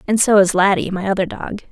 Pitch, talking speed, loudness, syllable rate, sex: 195 Hz, 245 wpm, -16 LUFS, 6.1 syllables/s, female